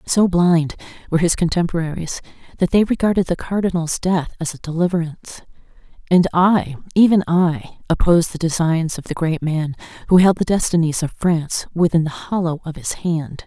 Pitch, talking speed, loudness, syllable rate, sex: 170 Hz, 165 wpm, -18 LUFS, 5.3 syllables/s, female